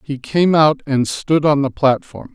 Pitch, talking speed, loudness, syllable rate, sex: 145 Hz, 205 wpm, -16 LUFS, 4.1 syllables/s, male